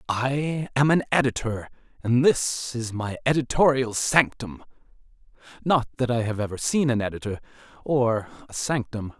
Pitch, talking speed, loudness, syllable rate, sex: 125 Hz, 135 wpm, -24 LUFS, 4.7 syllables/s, male